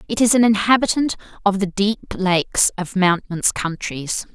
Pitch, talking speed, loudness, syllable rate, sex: 200 Hz, 150 wpm, -19 LUFS, 4.9 syllables/s, female